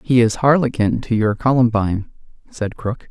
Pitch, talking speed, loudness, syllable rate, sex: 115 Hz, 155 wpm, -18 LUFS, 5.0 syllables/s, male